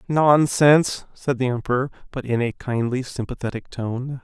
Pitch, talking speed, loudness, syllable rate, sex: 130 Hz, 125 wpm, -21 LUFS, 4.8 syllables/s, male